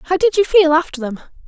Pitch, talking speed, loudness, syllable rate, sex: 330 Hz, 245 wpm, -14 LUFS, 5.9 syllables/s, female